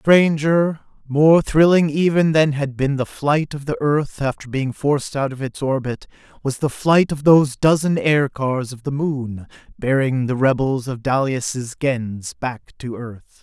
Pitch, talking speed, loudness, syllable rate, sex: 140 Hz, 170 wpm, -19 LUFS, 4.1 syllables/s, male